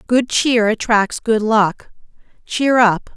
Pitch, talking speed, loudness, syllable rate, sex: 225 Hz, 135 wpm, -16 LUFS, 3.3 syllables/s, female